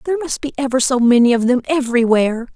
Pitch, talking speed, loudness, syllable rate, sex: 255 Hz, 210 wpm, -16 LUFS, 7.0 syllables/s, female